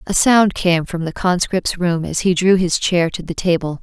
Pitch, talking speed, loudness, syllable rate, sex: 175 Hz, 235 wpm, -17 LUFS, 4.6 syllables/s, female